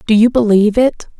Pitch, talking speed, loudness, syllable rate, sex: 225 Hz, 200 wpm, -12 LUFS, 6.5 syllables/s, female